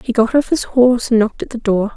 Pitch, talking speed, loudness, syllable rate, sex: 235 Hz, 305 wpm, -15 LUFS, 6.3 syllables/s, female